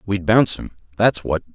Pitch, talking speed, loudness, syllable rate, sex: 95 Hz, 195 wpm, -19 LUFS, 5.7 syllables/s, male